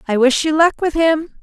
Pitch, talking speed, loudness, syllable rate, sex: 305 Hz, 250 wpm, -15 LUFS, 5.0 syllables/s, female